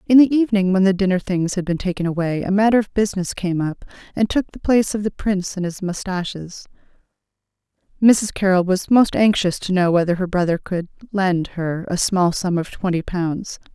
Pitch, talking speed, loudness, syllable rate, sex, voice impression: 190 Hz, 200 wpm, -19 LUFS, 5.5 syllables/s, female, feminine, adult-like, tensed, powerful, slightly soft, clear, slightly fluent, intellectual, calm, elegant, lively, slightly intense, slightly sharp